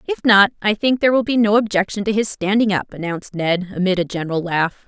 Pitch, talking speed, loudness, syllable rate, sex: 200 Hz, 235 wpm, -18 LUFS, 6.2 syllables/s, female